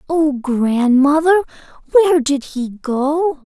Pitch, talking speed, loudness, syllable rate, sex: 290 Hz, 105 wpm, -16 LUFS, 3.3 syllables/s, female